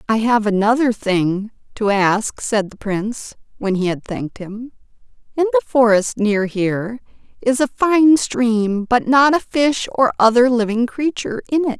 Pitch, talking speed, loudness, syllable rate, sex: 230 Hz, 170 wpm, -17 LUFS, 4.4 syllables/s, female